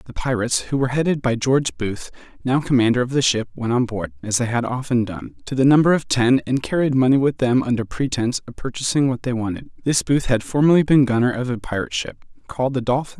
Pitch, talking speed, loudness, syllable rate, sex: 125 Hz, 230 wpm, -20 LUFS, 6.0 syllables/s, male